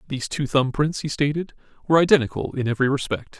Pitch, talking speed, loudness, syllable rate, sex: 140 Hz, 195 wpm, -22 LUFS, 7.0 syllables/s, male